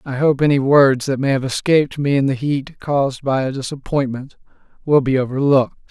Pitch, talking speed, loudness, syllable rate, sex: 135 Hz, 195 wpm, -17 LUFS, 5.6 syllables/s, male